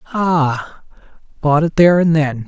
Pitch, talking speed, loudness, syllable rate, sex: 155 Hz, 145 wpm, -15 LUFS, 4.1 syllables/s, male